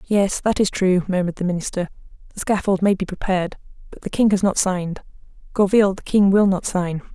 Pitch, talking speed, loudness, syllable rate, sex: 190 Hz, 200 wpm, -20 LUFS, 6.0 syllables/s, female